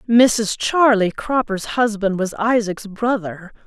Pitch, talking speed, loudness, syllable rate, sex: 215 Hz, 115 wpm, -18 LUFS, 3.6 syllables/s, female